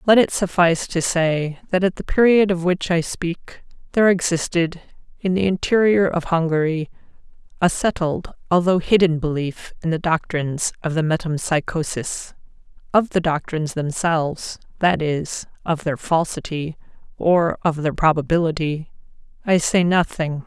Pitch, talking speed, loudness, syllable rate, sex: 170 Hz, 130 wpm, -20 LUFS, 4.7 syllables/s, female